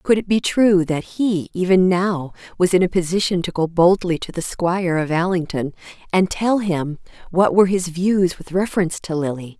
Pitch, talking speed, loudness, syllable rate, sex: 180 Hz, 195 wpm, -19 LUFS, 4.9 syllables/s, female